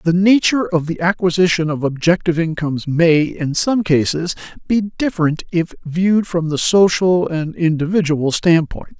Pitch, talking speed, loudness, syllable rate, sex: 170 Hz, 145 wpm, -16 LUFS, 4.9 syllables/s, male